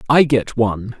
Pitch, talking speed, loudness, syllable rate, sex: 115 Hz, 180 wpm, -17 LUFS, 4.9 syllables/s, male